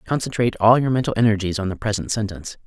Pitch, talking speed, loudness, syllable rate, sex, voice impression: 105 Hz, 205 wpm, -20 LUFS, 7.2 syllables/s, male, masculine, very adult-like, fluent, slightly cool, slightly refreshing, slightly unique